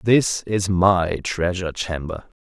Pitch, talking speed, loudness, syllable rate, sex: 90 Hz, 125 wpm, -21 LUFS, 3.7 syllables/s, male